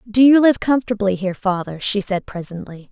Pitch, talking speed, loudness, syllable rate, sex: 210 Hz, 185 wpm, -18 LUFS, 5.7 syllables/s, female